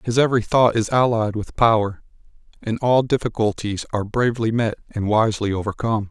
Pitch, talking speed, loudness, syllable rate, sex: 110 Hz, 155 wpm, -20 LUFS, 6.0 syllables/s, male